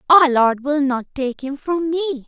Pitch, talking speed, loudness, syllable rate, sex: 285 Hz, 210 wpm, -18 LUFS, 4.7 syllables/s, female